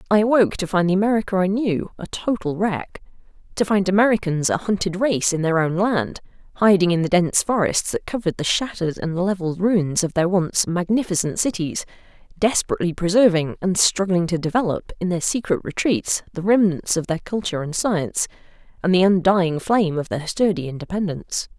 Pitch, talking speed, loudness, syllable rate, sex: 185 Hz, 170 wpm, -20 LUFS, 5.7 syllables/s, female